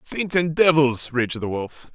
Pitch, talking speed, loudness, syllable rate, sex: 145 Hz, 185 wpm, -20 LUFS, 3.8 syllables/s, male